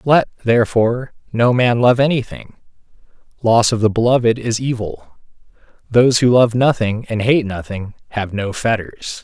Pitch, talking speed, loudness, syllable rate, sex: 115 Hz, 145 wpm, -16 LUFS, 4.7 syllables/s, male